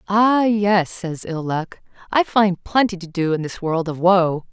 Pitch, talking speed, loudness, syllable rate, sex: 185 Hz, 200 wpm, -19 LUFS, 4.0 syllables/s, female